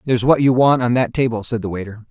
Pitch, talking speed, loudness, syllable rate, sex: 120 Hz, 285 wpm, -17 LUFS, 6.6 syllables/s, male